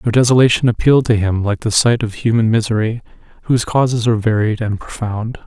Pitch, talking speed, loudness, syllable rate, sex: 115 Hz, 185 wpm, -15 LUFS, 6.1 syllables/s, male